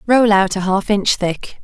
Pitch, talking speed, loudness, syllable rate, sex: 200 Hz, 220 wpm, -16 LUFS, 4.0 syllables/s, female